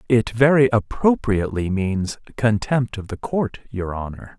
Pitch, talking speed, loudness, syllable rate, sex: 110 Hz, 135 wpm, -21 LUFS, 4.4 syllables/s, male